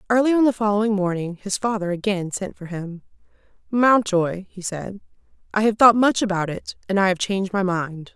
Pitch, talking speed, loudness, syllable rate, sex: 200 Hz, 190 wpm, -21 LUFS, 5.3 syllables/s, female